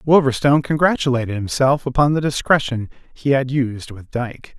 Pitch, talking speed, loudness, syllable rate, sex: 135 Hz, 145 wpm, -18 LUFS, 5.5 syllables/s, male